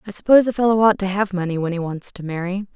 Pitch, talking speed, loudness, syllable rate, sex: 195 Hz, 285 wpm, -19 LUFS, 7.0 syllables/s, female